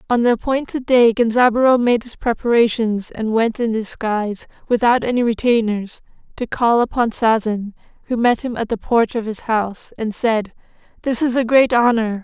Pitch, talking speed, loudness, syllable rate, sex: 230 Hz, 170 wpm, -18 LUFS, 5.0 syllables/s, female